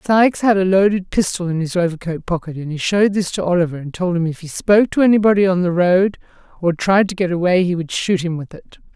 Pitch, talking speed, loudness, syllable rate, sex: 180 Hz, 250 wpm, -17 LUFS, 6.2 syllables/s, female